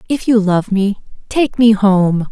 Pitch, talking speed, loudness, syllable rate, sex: 210 Hz, 180 wpm, -14 LUFS, 3.8 syllables/s, female